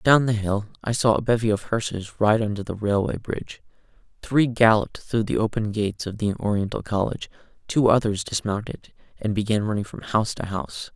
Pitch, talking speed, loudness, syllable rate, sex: 110 Hz, 185 wpm, -23 LUFS, 5.7 syllables/s, male